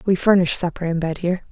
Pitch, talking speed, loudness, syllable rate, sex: 175 Hz, 240 wpm, -20 LUFS, 6.6 syllables/s, female